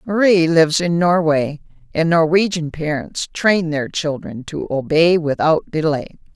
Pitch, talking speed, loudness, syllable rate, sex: 160 Hz, 130 wpm, -17 LUFS, 4.3 syllables/s, female